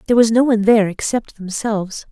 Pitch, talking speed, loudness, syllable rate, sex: 215 Hz, 200 wpm, -17 LUFS, 6.7 syllables/s, female